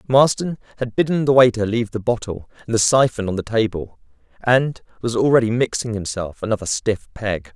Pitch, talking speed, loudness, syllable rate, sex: 115 Hz, 175 wpm, -19 LUFS, 5.5 syllables/s, male